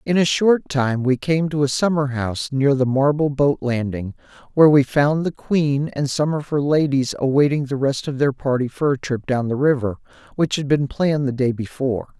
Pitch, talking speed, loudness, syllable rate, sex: 140 Hz, 215 wpm, -19 LUFS, 5.2 syllables/s, male